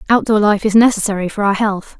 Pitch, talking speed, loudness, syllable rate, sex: 210 Hz, 240 wpm, -14 LUFS, 6.2 syllables/s, female